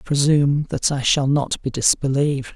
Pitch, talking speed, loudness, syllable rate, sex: 140 Hz, 190 wpm, -19 LUFS, 5.3 syllables/s, male